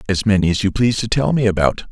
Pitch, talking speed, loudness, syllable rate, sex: 105 Hz, 280 wpm, -17 LUFS, 7.1 syllables/s, male